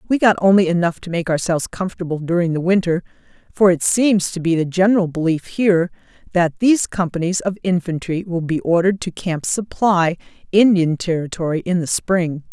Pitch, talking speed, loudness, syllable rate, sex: 180 Hz, 175 wpm, -18 LUFS, 5.5 syllables/s, female